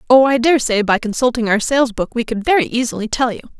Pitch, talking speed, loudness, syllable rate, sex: 240 Hz, 235 wpm, -16 LUFS, 6.5 syllables/s, female